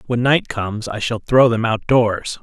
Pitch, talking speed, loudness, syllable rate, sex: 115 Hz, 225 wpm, -17 LUFS, 4.6 syllables/s, male